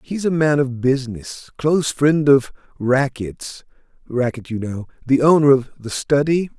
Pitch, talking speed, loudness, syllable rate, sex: 135 Hz, 145 wpm, -18 LUFS, 4.4 syllables/s, male